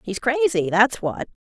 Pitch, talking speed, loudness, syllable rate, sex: 240 Hz, 170 wpm, -20 LUFS, 4.2 syllables/s, female